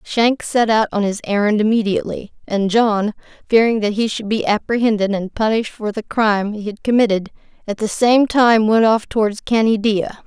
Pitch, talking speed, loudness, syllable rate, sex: 215 Hz, 175 wpm, -17 LUFS, 5.3 syllables/s, female